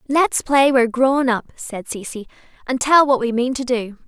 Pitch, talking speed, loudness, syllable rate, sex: 255 Hz, 205 wpm, -18 LUFS, 4.7 syllables/s, female